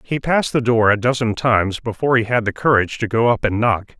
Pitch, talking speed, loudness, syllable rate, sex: 115 Hz, 255 wpm, -17 LUFS, 6.2 syllables/s, male